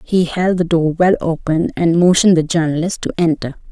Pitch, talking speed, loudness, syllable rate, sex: 170 Hz, 195 wpm, -15 LUFS, 5.3 syllables/s, female